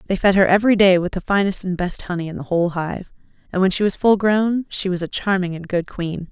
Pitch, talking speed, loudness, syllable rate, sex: 185 Hz, 265 wpm, -19 LUFS, 6.0 syllables/s, female